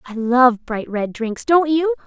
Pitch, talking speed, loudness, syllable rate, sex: 260 Hz, 205 wpm, -18 LUFS, 3.9 syllables/s, female